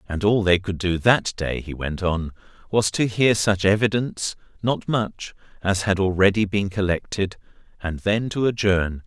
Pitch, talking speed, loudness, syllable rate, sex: 100 Hz, 160 wpm, -22 LUFS, 4.5 syllables/s, male